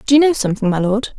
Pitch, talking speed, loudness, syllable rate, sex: 235 Hz, 305 wpm, -16 LUFS, 7.4 syllables/s, female